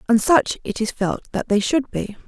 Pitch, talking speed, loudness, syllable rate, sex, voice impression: 235 Hz, 235 wpm, -20 LUFS, 4.9 syllables/s, female, very feminine, very adult-like, slightly middle-aged, very thin, slightly relaxed, slightly weak, slightly dark, very hard, very clear, very fluent, slightly raspy, slightly cute, intellectual, refreshing, very sincere, slightly calm, slightly friendly, slightly reassuring, very unique, slightly elegant, slightly wild, slightly sweet, slightly lively, very strict, slightly intense, very sharp, light